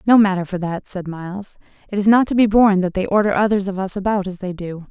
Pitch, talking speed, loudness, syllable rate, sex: 195 Hz, 270 wpm, -18 LUFS, 6.3 syllables/s, female